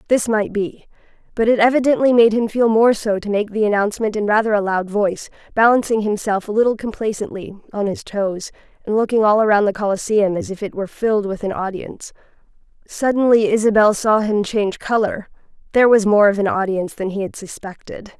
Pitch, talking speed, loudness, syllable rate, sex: 210 Hz, 190 wpm, -17 LUFS, 5.8 syllables/s, female